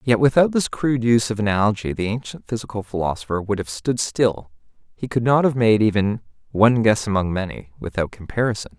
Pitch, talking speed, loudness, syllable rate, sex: 110 Hz, 185 wpm, -20 LUFS, 6.0 syllables/s, male